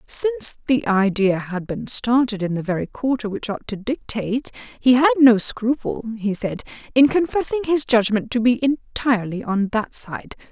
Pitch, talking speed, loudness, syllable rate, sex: 235 Hz, 170 wpm, -20 LUFS, 4.9 syllables/s, female